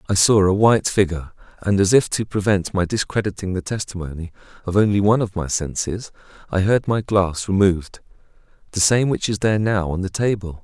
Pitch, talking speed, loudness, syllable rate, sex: 100 Hz, 185 wpm, -19 LUFS, 5.9 syllables/s, male